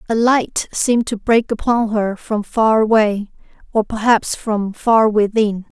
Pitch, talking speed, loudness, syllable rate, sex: 220 Hz, 145 wpm, -17 LUFS, 4.0 syllables/s, female